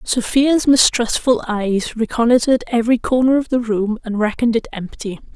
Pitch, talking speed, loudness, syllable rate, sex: 235 Hz, 145 wpm, -17 LUFS, 5.0 syllables/s, female